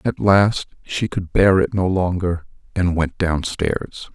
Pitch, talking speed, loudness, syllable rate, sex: 90 Hz, 160 wpm, -19 LUFS, 3.6 syllables/s, male